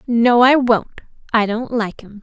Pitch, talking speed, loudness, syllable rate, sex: 230 Hz, 190 wpm, -16 LUFS, 4.3 syllables/s, female